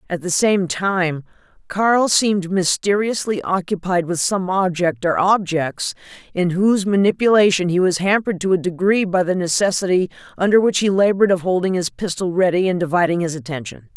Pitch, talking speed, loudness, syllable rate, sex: 185 Hz, 165 wpm, -18 LUFS, 5.3 syllables/s, female